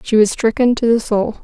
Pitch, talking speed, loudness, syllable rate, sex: 225 Hz, 250 wpm, -15 LUFS, 5.4 syllables/s, female